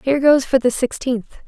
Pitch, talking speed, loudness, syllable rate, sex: 260 Hz, 205 wpm, -18 LUFS, 4.9 syllables/s, female